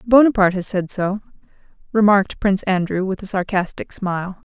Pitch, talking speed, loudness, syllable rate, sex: 195 Hz, 145 wpm, -19 LUFS, 5.8 syllables/s, female